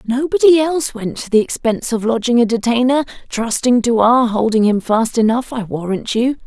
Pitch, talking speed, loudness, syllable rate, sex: 240 Hz, 185 wpm, -16 LUFS, 5.3 syllables/s, female